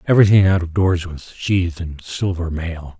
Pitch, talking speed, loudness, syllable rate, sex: 85 Hz, 180 wpm, -18 LUFS, 5.0 syllables/s, male